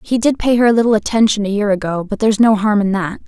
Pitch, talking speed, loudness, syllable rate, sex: 215 Hz, 295 wpm, -15 LUFS, 6.8 syllables/s, female